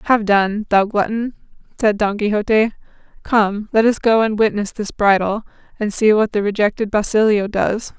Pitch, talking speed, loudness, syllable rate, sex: 210 Hz, 165 wpm, -17 LUFS, 4.8 syllables/s, female